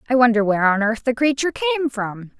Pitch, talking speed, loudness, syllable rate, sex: 245 Hz, 225 wpm, -19 LUFS, 6.7 syllables/s, female